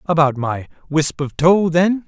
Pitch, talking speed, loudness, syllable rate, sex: 160 Hz, 175 wpm, -17 LUFS, 4.1 syllables/s, male